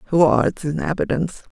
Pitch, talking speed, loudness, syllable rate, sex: 155 Hz, 155 wpm, -20 LUFS, 6.6 syllables/s, female